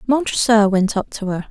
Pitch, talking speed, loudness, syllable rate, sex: 215 Hz, 200 wpm, -17 LUFS, 5.1 syllables/s, female